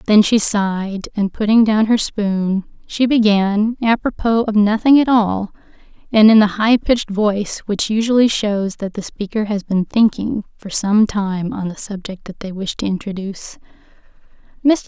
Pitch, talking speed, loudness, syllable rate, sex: 210 Hz, 165 wpm, -17 LUFS, 4.6 syllables/s, female